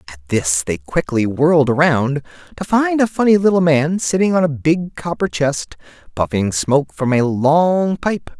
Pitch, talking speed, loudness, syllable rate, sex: 150 Hz, 170 wpm, -16 LUFS, 4.5 syllables/s, male